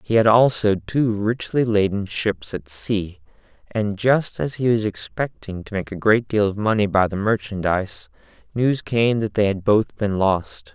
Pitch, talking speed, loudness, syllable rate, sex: 105 Hz, 185 wpm, -21 LUFS, 4.3 syllables/s, male